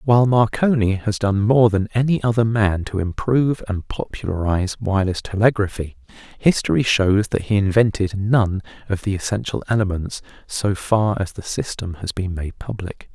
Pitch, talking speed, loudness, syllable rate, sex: 105 Hz, 155 wpm, -20 LUFS, 5.1 syllables/s, male